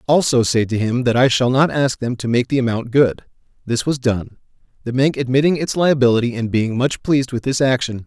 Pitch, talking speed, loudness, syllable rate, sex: 125 Hz, 225 wpm, -17 LUFS, 5.5 syllables/s, male